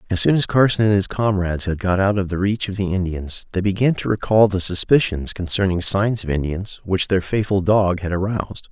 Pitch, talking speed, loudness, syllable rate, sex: 95 Hz, 220 wpm, -19 LUFS, 5.5 syllables/s, male